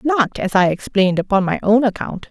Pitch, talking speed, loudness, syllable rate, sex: 210 Hz, 210 wpm, -17 LUFS, 5.5 syllables/s, female